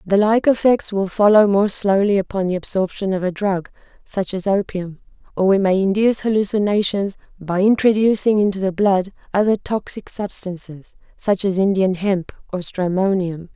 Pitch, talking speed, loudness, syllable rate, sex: 195 Hz, 155 wpm, -18 LUFS, 4.9 syllables/s, female